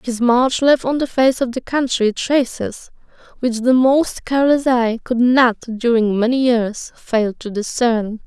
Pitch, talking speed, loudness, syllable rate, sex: 245 Hz, 165 wpm, -17 LUFS, 4.0 syllables/s, female